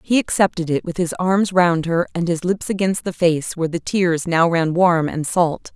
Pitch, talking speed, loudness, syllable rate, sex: 175 Hz, 230 wpm, -19 LUFS, 4.7 syllables/s, female